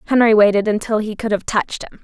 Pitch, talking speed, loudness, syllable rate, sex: 215 Hz, 235 wpm, -16 LUFS, 6.6 syllables/s, female